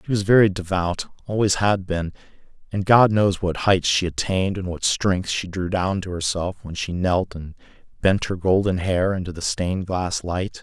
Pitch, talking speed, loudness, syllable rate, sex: 95 Hz, 200 wpm, -22 LUFS, 4.8 syllables/s, male